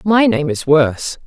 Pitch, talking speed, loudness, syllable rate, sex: 165 Hz, 190 wpm, -15 LUFS, 4.5 syllables/s, female